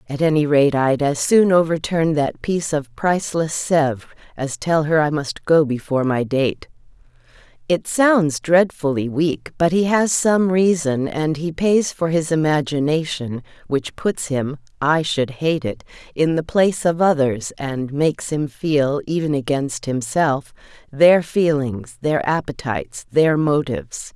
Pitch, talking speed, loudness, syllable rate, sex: 150 Hz, 150 wpm, -19 LUFS, 4.2 syllables/s, female